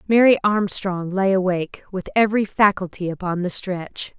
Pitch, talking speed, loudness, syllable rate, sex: 190 Hz, 145 wpm, -20 LUFS, 5.0 syllables/s, female